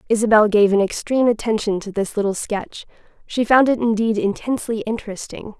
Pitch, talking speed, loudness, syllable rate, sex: 215 Hz, 160 wpm, -19 LUFS, 5.8 syllables/s, female